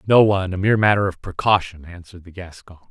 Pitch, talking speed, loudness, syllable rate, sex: 95 Hz, 205 wpm, -18 LUFS, 6.8 syllables/s, male